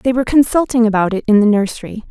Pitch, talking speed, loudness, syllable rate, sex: 230 Hz, 230 wpm, -14 LUFS, 7.1 syllables/s, female